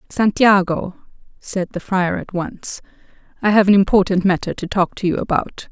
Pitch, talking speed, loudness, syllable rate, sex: 190 Hz, 170 wpm, -18 LUFS, 4.9 syllables/s, female